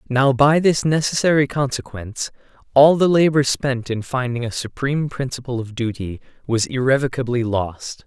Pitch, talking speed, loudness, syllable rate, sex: 130 Hz, 140 wpm, -19 LUFS, 5.0 syllables/s, male